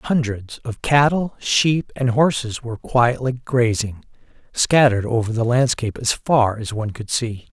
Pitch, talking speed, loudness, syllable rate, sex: 120 Hz, 150 wpm, -19 LUFS, 4.5 syllables/s, male